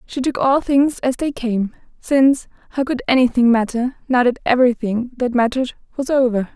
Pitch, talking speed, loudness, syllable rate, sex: 250 Hz, 175 wpm, -18 LUFS, 5.4 syllables/s, female